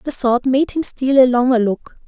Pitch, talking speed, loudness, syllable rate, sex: 255 Hz, 230 wpm, -16 LUFS, 4.8 syllables/s, female